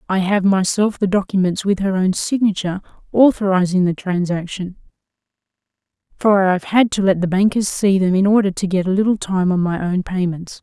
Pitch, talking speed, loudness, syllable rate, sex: 190 Hz, 185 wpm, -17 LUFS, 5.5 syllables/s, female